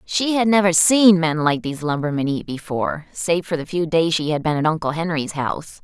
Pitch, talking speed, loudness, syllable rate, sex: 165 Hz, 225 wpm, -19 LUFS, 5.5 syllables/s, female